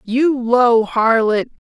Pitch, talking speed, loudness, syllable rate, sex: 235 Hz, 105 wpm, -15 LUFS, 3.0 syllables/s, female